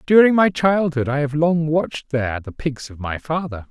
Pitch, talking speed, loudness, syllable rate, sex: 150 Hz, 210 wpm, -19 LUFS, 5.1 syllables/s, male